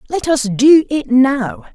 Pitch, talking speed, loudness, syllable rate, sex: 270 Hz, 170 wpm, -13 LUFS, 3.6 syllables/s, female